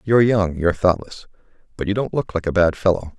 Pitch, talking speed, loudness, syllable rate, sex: 95 Hz, 225 wpm, -19 LUFS, 6.2 syllables/s, male